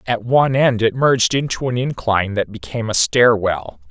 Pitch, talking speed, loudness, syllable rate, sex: 115 Hz, 185 wpm, -17 LUFS, 5.4 syllables/s, male